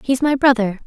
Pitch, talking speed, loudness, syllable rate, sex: 250 Hz, 210 wpm, -16 LUFS, 5.6 syllables/s, female